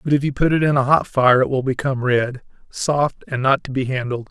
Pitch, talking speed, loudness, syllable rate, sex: 135 Hz, 265 wpm, -19 LUFS, 5.6 syllables/s, male